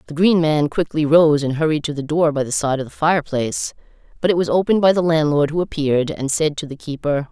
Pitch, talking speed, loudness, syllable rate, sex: 155 Hz, 245 wpm, -18 LUFS, 6.2 syllables/s, female